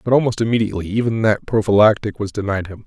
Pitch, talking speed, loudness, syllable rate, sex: 105 Hz, 190 wpm, -18 LUFS, 6.9 syllables/s, male